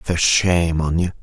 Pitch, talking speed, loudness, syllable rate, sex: 85 Hz, 195 wpm, -18 LUFS, 4.5 syllables/s, male